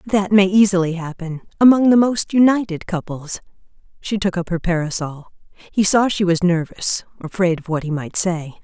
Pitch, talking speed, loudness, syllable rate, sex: 185 Hz, 175 wpm, -18 LUFS, 5.0 syllables/s, female